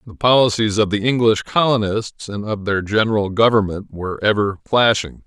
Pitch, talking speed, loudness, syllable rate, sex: 105 Hz, 160 wpm, -18 LUFS, 5.2 syllables/s, male